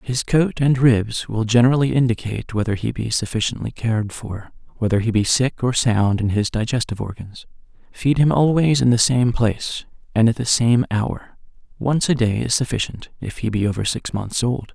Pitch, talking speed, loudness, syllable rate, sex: 120 Hz, 190 wpm, -19 LUFS, 5.2 syllables/s, male